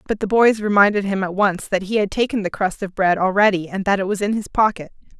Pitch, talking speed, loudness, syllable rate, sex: 200 Hz, 265 wpm, -19 LUFS, 6.1 syllables/s, female